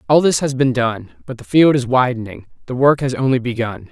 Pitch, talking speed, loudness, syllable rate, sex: 125 Hz, 230 wpm, -16 LUFS, 5.5 syllables/s, male